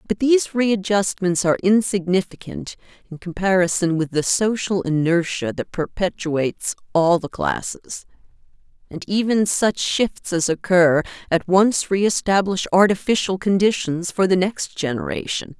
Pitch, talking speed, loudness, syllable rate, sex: 185 Hz, 120 wpm, -20 LUFS, 4.6 syllables/s, female